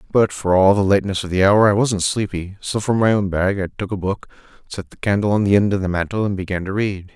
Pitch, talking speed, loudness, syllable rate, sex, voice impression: 100 Hz, 275 wpm, -18 LUFS, 6.1 syllables/s, male, very masculine, very adult-like, very middle-aged, very thick, tensed, very powerful, bright, slightly soft, slightly muffled, fluent, very cool, intellectual, sincere, very calm, very mature, friendly, reassuring, unique, wild, sweet, kind, slightly modest